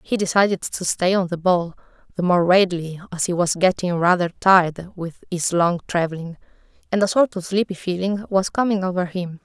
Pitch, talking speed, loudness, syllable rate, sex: 185 Hz, 190 wpm, -20 LUFS, 5.3 syllables/s, female